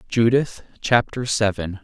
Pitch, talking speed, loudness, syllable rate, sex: 110 Hz, 100 wpm, -20 LUFS, 4.0 syllables/s, male